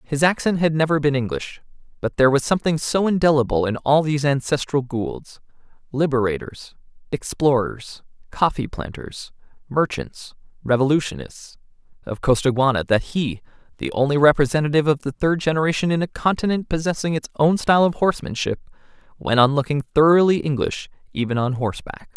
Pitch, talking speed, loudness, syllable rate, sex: 145 Hz, 135 wpm, -20 LUFS, 5.6 syllables/s, male